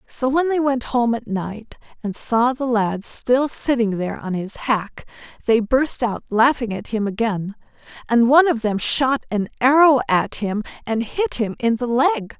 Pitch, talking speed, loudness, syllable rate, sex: 240 Hz, 190 wpm, -20 LUFS, 4.3 syllables/s, female